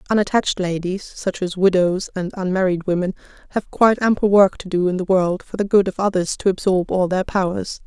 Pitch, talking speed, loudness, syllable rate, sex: 190 Hz, 205 wpm, -19 LUFS, 5.6 syllables/s, female